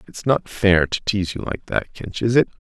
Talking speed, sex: 245 wpm, male